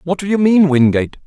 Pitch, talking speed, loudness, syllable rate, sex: 165 Hz, 235 wpm, -13 LUFS, 6.3 syllables/s, male